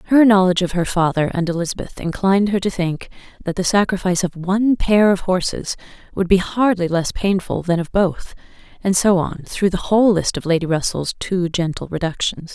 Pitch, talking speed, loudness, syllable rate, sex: 185 Hz, 190 wpm, -18 LUFS, 5.5 syllables/s, female